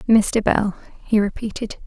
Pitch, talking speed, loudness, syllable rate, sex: 210 Hz, 130 wpm, -21 LUFS, 4.3 syllables/s, female